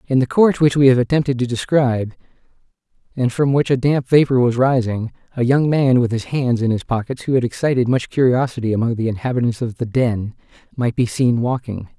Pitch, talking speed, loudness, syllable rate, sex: 125 Hz, 205 wpm, -18 LUFS, 5.7 syllables/s, male